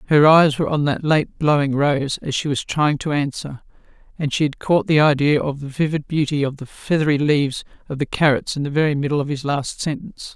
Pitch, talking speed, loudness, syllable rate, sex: 145 Hz, 225 wpm, -19 LUFS, 5.7 syllables/s, female